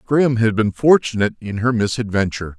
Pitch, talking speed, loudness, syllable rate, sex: 115 Hz, 165 wpm, -18 LUFS, 5.8 syllables/s, male